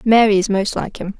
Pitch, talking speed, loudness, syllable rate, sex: 205 Hz, 250 wpm, -17 LUFS, 5.5 syllables/s, female